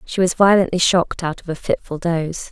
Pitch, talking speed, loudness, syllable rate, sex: 175 Hz, 215 wpm, -18 LUFS, 5.9 syllables/s, female